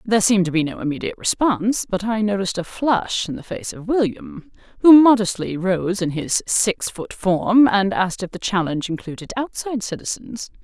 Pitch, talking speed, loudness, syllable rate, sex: 205 Hz, 185 wpm, -20 LUFS, 5.4 syllables/s, female